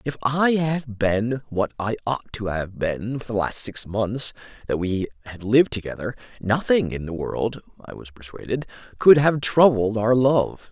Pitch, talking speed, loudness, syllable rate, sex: 115 Hz, 180 wpm, -22 LUFS, 4.3 syllables/s, male